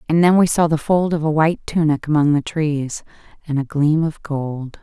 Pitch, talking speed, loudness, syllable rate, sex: 155 Hz, 225 wpm, -18 LUFS, 5.0 syllables/s, female